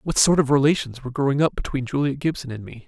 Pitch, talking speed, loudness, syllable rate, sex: 135 Hz, 250 wpm, -21 LUFS, 6.7 syllables/s, male